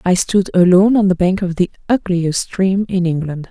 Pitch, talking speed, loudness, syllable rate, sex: 185 Hz, 205 wpm, -15 LUFS, 5.1 syllables/s, female